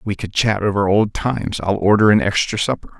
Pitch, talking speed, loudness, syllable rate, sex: 100 Hz, 200 wpm, -17 LUFS, 5.6 syllables/s, male